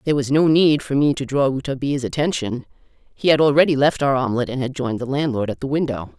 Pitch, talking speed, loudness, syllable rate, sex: 135 Hz, 235 wpm, -19 LUFS, 6.8 syllables/s, female